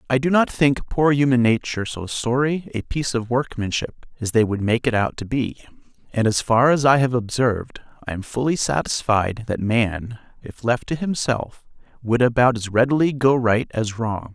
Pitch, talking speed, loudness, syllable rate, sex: 120 Hz, 190 wpm, -21 LUFS, 4.9 syllables/s, male